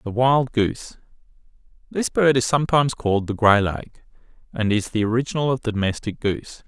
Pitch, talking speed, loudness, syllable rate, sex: 120 Hz, 160 wpm, -21 LUFS, 5.8 syllables/s, male